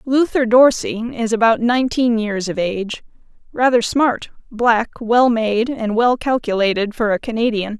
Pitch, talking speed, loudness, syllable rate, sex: 230 Hz, 145 wpm, -17 LUFS, 4.4 syllables/s, female